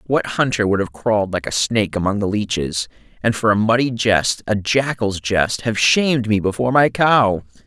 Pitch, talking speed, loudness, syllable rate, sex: 110 Hz, 180 wpm, -18 LUFS, 5.0 syllables/s, male